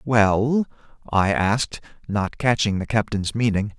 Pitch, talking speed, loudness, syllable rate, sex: 110 Hz, 125 wpm, -22 LUFS, 4.0 syllables/s, male